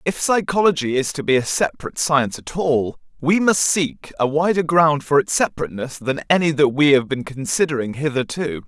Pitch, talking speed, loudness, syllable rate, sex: 150 Hz, 185 wpm, -19 LUFS, 5.4 syllables/s, male